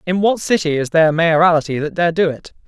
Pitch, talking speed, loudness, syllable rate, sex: 165 Hz, 245 wpm, -16 LUFS, 6.1 syllables/s, male